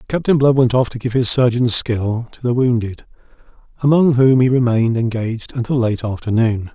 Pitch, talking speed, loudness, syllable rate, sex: 120 Hz, 180 wpm, -16 LUFS, 5.4 syllables/s, male